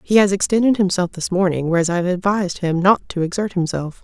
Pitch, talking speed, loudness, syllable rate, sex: 185 Hz, 225 wpm, -18 LUFS, 6.1 syllables/s, female